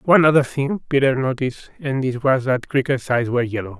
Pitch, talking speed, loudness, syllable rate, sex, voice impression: 130 Hz, 205 wpm, -19 LUFS, 5.8 syllables/s, male, very masculine, very adult-like, old, thick, relaxed, weak, slightly dark, soft, muffled, halting, slightly cool, intellectual, very sincere, very calm, very mature, slightly friendly, slightly reassuring, very unique, elegant, very kind, very modest